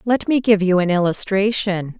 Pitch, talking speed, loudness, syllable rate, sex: 205 Hz, 180 wpm, -18 LUFS, 4.8 syllables/s, female